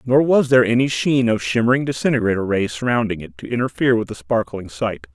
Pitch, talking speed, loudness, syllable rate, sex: 115 Hz, 200 wpm, -19 LUFS, 6.2 syllables/s, male